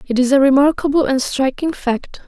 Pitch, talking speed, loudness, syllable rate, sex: 275 Hz, 185 wpm, -16 LUFS, 5.2 syllables/s, female